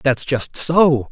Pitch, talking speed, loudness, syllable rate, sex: 145 Hz, 160 wpm, -16 LUFS, 3.0 syllables/s, male